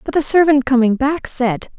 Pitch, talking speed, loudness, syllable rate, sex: 270 Hz, 200 wpm, -15 LUFS, 5.0 syllables/s, female